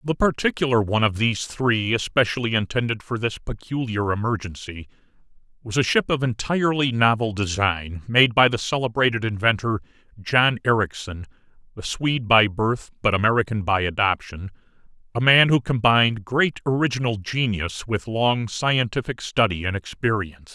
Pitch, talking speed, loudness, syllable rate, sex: 115 Hz, 135 wpm, -21 LUFS, 5.2 syllables/s, male